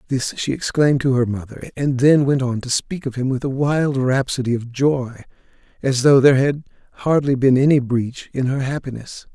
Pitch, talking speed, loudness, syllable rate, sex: 130 Hz, 200 wpm, -18 LUFS, 5.1 syllables/s, male